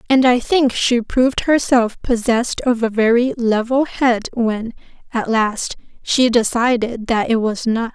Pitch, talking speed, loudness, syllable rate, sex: 235 Hz, 160 wpm, -17 LUFS, 4.2 syllables/s, female